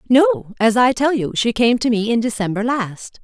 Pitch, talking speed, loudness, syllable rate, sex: 230 Hz, 220 wpm, -17 LUFS, 4.9 syllables/s, female